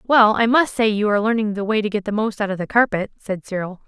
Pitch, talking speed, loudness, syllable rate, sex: 210 Hz, 295 wpm, -19 LUFS, 6.2 syllables/s, female